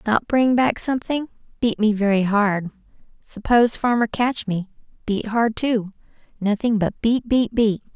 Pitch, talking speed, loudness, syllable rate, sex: 225 Hz, 150 wpm, -20 LUFS, 4.5 syllables/s, female